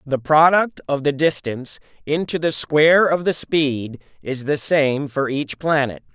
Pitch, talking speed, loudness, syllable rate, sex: 145 Hz, 165 wpm, -19 LUFS, 4.2 syllables/s, male